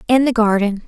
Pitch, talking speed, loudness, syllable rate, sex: 225 Hz, 205 wpm, -16 LUFS, 5.8 syllables/s, female